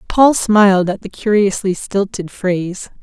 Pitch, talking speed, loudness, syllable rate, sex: 200 Hz, 140 wpm, -15 LUFS, 4.4 syllables/s, female